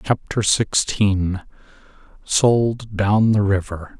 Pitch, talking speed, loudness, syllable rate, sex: 105 Hz, 90 wpm, -19 LUFS, 2.9 syllables/s, male